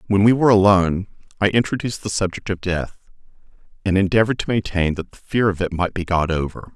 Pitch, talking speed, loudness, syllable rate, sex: 100 Hz, 205 wpm, -20 LUFS, 6.4 syllables/s, male